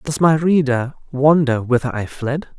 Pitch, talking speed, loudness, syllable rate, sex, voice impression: 140 Hz, 165 wpm, -17 LUFS, 4.4 syllables/s, male, masculine, slightly feminine, very gender-neutral, very adult-like, slightly middle-aged, slightly thin, relaxed, weak, dark, slightly soft, slightly muffled, fluent, slightly cool, very intellectual, slightly refreshing, very sincere, very calm, slightly mature, very friendly, reassuring, very unique, elegant, sweet, slightly lively, kind, modest, slightly light